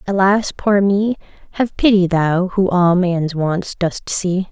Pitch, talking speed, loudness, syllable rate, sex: 185 Hz, 160 wpm, -16 LUFS, 3.5 syllables/s, female